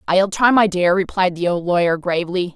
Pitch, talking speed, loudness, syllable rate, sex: 180 Hz, 210 wpm, -17 LUFS, 5.4 syllables/s, female